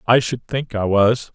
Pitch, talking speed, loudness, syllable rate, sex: 115 Hz, 225 wpm, -19 LUFS, 4.1 syllables/s, male